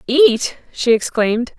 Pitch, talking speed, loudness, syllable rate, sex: 250 Hz, 115 wpm, -16 LUFS, 3.8 syllables/s, female